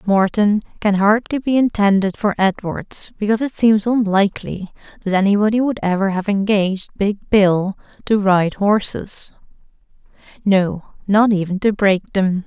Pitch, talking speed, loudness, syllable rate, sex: 200 Hz, 135 wpm, -17 LUFS, 4.5 syllables/s, female